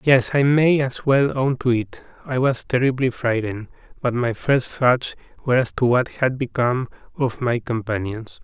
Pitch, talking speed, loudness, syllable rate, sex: 125 Hz, 180 wpm, -21 LUFS, 4.7 syllables/s, male